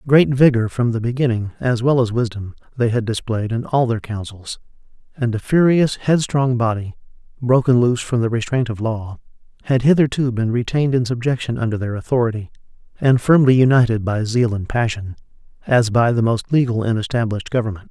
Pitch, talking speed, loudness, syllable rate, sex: 120 Hz, 175 wpm, -18 LUFS, 5.6 syllables/s, male